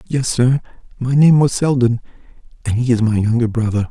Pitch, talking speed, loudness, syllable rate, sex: 120 Hz, 185 wpm, -16 LUFS, 5.5 syllables/s, male